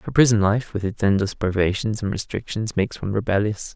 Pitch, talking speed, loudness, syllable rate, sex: 105 Hz, 190 wpm, -22 LUFS, 5.9 syllables/s, male